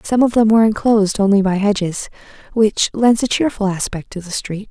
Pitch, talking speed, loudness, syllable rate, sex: 210 Hz, 205 wpm, -16 LUFS, 5.6 syllables/s, female